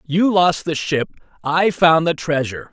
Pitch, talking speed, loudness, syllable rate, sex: 160 Hz, 175 wpm, -17 LUFS, 4.5 syllables/s, male